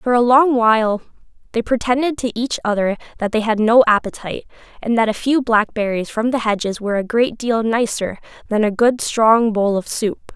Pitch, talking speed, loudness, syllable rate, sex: 225 Hz, 195 wpm, -17 LUFS, 5.2 syllables/s, female